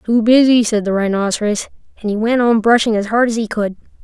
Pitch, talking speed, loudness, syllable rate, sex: 220 Hz, 225 wpm, -15 LUFS, 5.9 syllables/s, female